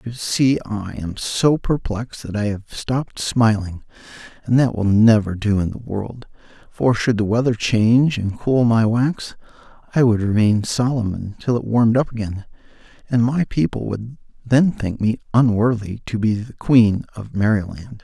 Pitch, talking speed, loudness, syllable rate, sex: 115 Hz, 170 wpm, -19 LUFS, 4.5 syllables/s, male